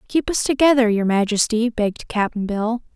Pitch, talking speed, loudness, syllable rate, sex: 225 Hz, 165 wpm, -19 LUFS, 4.8 syllables/s, female